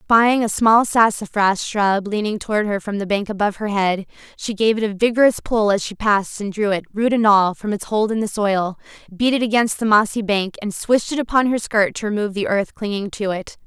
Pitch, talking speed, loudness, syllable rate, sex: 210 Hz, 235 wpm, -19 LUFS, 5.5 syllables/s, female